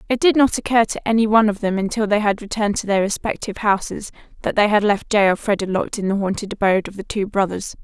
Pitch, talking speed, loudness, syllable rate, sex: 205 Hz, 245 wpm, -19 LUFS, 6.7 syllables/s, female